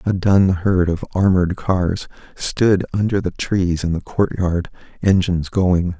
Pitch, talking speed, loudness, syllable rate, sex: 90 Hz, 160 wpm, -18 LUFS, 4.1 syllables/s, male